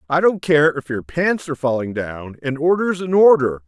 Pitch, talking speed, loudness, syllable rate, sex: 150 Hz, 215 wpm, -18 LUFS, 5.0 syllables/s, male